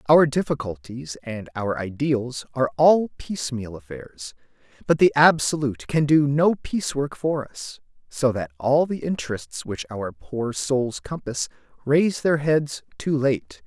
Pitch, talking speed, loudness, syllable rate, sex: 135 Hz, 145 wpm, -23 LUFS, 4.3 syllables/s, male